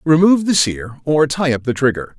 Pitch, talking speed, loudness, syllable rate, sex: 145 Hz, 220 wpm, -16 LUFS, 5.5 syllables/s, male